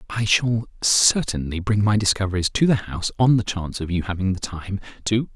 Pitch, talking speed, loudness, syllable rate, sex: 100 Hz, 200 wpm, -21 LUFS, 5.5 syllables/s, male